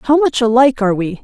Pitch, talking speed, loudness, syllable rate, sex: 245 Hz, 245 wpm, -13 LUFS, 6.7 syllables/s, female